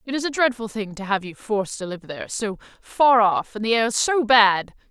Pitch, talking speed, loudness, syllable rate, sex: 220 Hz, 220 wpm, -21 LUFS, 5.2 syllables/s, female